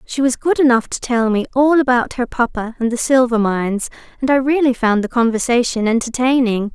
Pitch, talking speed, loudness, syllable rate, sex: 245 Hz, 195 wpm, -16 LUFS, 5.5 syllables/s, female